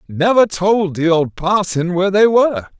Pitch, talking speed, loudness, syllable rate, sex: 185 Hz, 170 wpm, -15 LUFS, 4.7 syllables/s, male